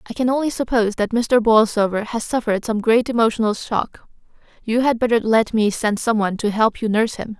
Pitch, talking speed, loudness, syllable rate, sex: 225 Hz, 205 wpm, -19 LUFS, 6.0 syllables/s, female